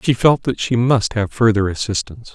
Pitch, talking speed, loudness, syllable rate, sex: 110 Hz, 205 wpm, -17 LUFS, 5.3 syllables/s, male